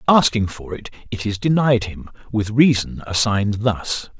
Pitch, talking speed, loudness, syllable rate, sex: 110 Hz, 155 wpm, -19 LUFS, 4.6 syllables/s, male